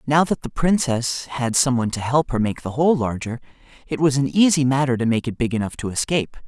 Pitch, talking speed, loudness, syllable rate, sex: 135 Hz, 240 wpm, -21 LUFS, 5.8 syllables/s, male